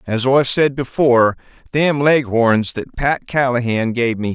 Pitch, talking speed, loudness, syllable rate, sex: 125 Hz, 150 wpm, -16 LUFS, 4.2 syllables/s, male